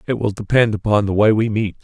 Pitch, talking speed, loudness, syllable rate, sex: 105 Hz, 260 wpm, -17 LUFS, 6.1 syllables/s, male